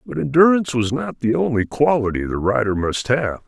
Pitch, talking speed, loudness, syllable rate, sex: 130 Hz, 190 wpm, -19 LUFS, 5.4 syllables/s, male